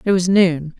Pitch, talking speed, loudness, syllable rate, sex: 180 Hz, 225 wpm, -16 LUFS, 4.4 syllables/s, female